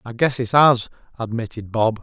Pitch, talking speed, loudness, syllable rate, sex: 120 Hz, 180 wpm, -19 LUFS, 4.9 syllables/s, male